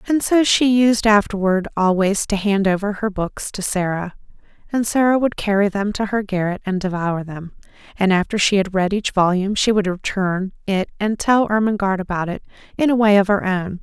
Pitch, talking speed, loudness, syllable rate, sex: 200 Hz, 200 wpm, -18 LUFS, 5.3 syllables/s, female